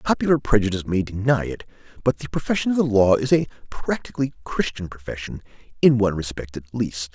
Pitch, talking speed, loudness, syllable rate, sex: 110 Hz, 175 wpm, -22 LUFS, 6.3 syllables/s, male